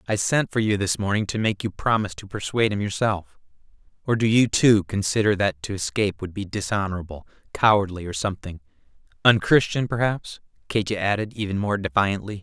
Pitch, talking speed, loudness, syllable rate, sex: 105 Hz, 170 wpm, -23 LUFS, 5.9 syllables/s, male